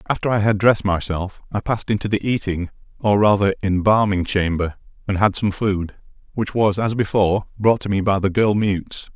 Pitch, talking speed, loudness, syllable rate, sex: 100 Hz, 190 wpm, -19 LUFS, 5.5 syllables/s, male